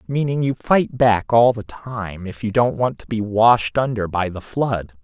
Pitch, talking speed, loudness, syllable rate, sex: 110 Hz, 215 wpm, -19 LUFS, 4.2 syllables/s, male